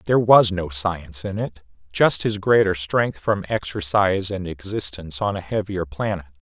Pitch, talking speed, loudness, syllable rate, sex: 95 Hz, 165 wpm, -21 LUFS, 5.0 syllables/s, male